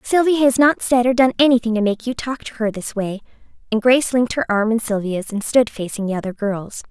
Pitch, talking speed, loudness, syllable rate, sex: 230 Hz, 245 wpm, -18 LUFS, 5.8 syllables/s, female